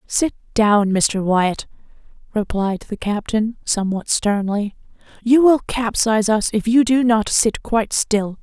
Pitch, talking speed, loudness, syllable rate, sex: 215 Hz, 140 wpm, -18 LUFS, 4.1 syllables/s, female